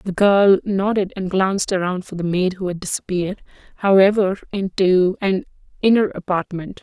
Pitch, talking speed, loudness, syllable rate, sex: 190 Hz, 150 wpm, -19 LUFS, 5.0 syllables/s, female